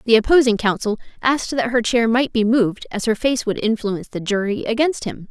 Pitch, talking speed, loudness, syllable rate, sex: 225 Hz, 215 wpm, -19 LUFS, 5.7 syllables/s, female